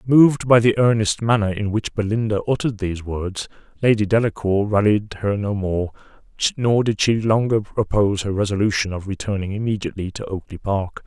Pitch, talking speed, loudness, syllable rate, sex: 105 Hz, 165 wpm, -20 LUFS, 5.7 syllables/s, male